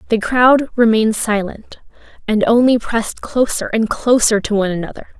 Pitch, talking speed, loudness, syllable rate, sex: 225 Hz, 150 wpm, -15 LUFS, 5.2 syllables/s, female